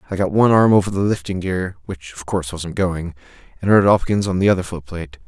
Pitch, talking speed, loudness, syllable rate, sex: 90 Hz, 230 wpm, -18 LUFS, 5.6 syllables/s, male